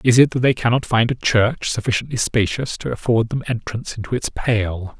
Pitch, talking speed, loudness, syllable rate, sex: 115 Hz, 205 wpm, -19 LUFS, 5.4 syllables/s, male